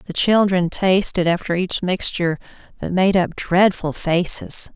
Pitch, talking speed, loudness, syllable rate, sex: 180 Hz, 140 wpm, -18 LUFS, 4.2 syllables/s, female